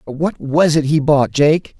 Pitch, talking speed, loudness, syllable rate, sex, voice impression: 150 Hz, 200 wpm, -15 LUFS, 3.7 syllables/s, male, masculine, slightly middle-aged, slightly powerful, slightly bright, fluent, raspy, friendly, slightly wild, lively, kind